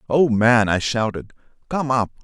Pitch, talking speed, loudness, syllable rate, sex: 120 Hz, 160 wpm, -19 LUFS, 4.4 syllables/s, male